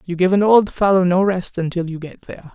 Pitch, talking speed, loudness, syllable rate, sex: 180 Hz, 260 wpm, -17 LUFS, 5.7 syllables/s, female